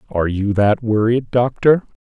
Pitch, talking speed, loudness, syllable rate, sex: 115 Hz, 150 wpm, -17 LUFS, 4.9 syllables/s, male